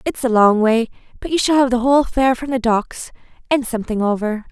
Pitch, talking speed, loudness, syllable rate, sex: 240 Hz, 215 wpm, -17 LUFS, 5.8 syllables/s, female